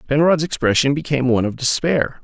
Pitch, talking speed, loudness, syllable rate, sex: 140 Hz, 160 wpm, -18 LUFS, 6.5 syllables/s, male